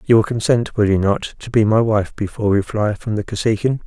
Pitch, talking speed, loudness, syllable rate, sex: 110 Hz, 250 wpm, -18 LUFS, 5.7 syllables/s, male